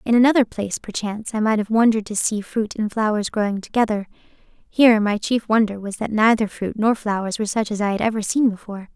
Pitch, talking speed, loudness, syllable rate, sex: 215 Hz, 220 wpm, -20 LUFS, 6.0 syllables/s, female